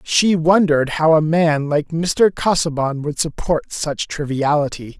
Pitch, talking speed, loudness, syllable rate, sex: 155 Hz, 145 wpm, -17 LUFS, 4.1 syllables/s, male